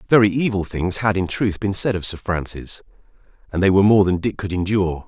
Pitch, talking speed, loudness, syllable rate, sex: 95 Hz, 225 wpm, -19 LUFS, 6.0 syllables/s, male